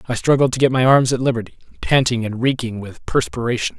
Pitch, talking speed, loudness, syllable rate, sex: 120 Hz, 205 wpm, -18 LUFS, 6.2 syllables/s, male